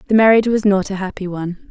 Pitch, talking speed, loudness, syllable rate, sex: 200 Hz, 245 wpm, -16 LUFS, 7.3 syllables/s, female